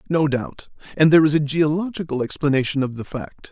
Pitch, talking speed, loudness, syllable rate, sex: 150 Hz, 190 wpm, -20 LUFS, 5.9 syllables/s, male